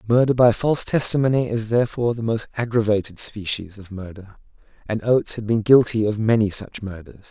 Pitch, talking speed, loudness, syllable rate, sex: 110 Hz, 175 wpm, -20 LUFS, 5.8 syllables/s, male